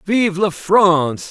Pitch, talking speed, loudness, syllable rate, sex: 185 Hz, 140 wpm, -15 LUFS, 3.3 syllables/s, male